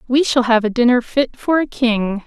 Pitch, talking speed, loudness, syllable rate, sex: 240 Hz, 240 wpm, -16 LUFS, 4.7 syllables/s, female